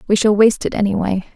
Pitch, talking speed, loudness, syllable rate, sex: 205 Hz, 220 wpm, -16 LUFS, 7.1 syllables/s, female